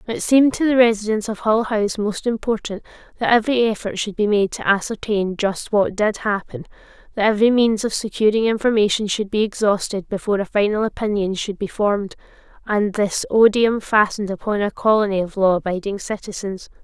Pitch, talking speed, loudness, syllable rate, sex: 210 Hz, 175 wpm, -19 LUFS, 5.7 syllables/s, female